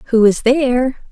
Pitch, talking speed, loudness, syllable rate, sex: 245 Hz, 160 wpm, -14 LUFS, 5.1 syllables/s, female